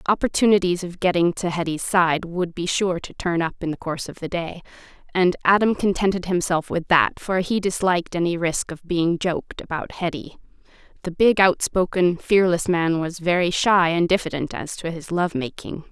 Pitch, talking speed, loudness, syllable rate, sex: 175 Hz, 180 wpm, -21 LUFS, 5.1 syllables/s, female